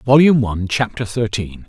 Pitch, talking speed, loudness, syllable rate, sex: 115 Hz, 145 wpm, -17 LUFS, 5.5 syllables/s, male